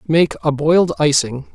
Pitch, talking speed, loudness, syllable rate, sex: 155 Hz, 155 wpm, -16 LUFS, 4.6 syllables/s, male